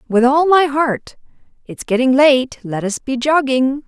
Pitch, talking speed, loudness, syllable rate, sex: 265 Hz, 170 wpm, -15 LUFS, 4.1 syllables/s, female